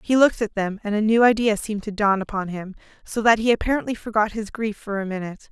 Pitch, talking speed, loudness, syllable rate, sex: 210 Hz, 250 wpm, -22 LUFS, 6.5 syllables/s, female